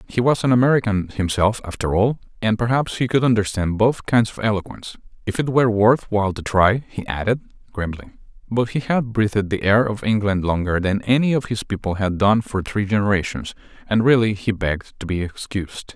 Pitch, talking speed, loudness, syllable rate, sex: 105 Hz, 190 wpm, -20 LUFS, 5.6 syllables/s, male